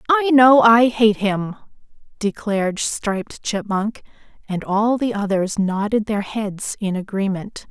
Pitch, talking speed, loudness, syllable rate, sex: 210 Hz, 130 wpm, -19 LUFS, 3.9 syllables/s, female